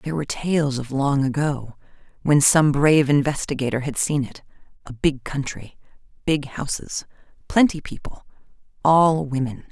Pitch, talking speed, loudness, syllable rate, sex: 145 Hz, 130 wpm, -21 LUFS, 5.0 syllables/s, female